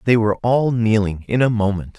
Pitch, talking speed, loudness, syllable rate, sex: 110 Hz, 210 wpm, -18 LUFS, 5.5 syllables/s, male